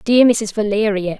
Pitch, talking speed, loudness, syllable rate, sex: 210 Hz, 150 wpm, -16 LUFS, 4.6 syllables/s, female